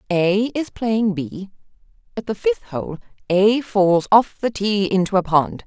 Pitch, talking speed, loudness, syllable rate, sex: 200 Hz, 170 wpm, -19 LUFS, 4.0 syllables/s, female